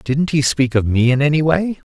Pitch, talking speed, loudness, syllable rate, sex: 140 Hz, 250 wpm, -16 LUFS, 5.0 syllables/s, male